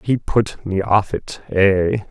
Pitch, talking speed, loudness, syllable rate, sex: 100 Hz, 170 wpm, -18 LUFS, 3.1 syllables/s, male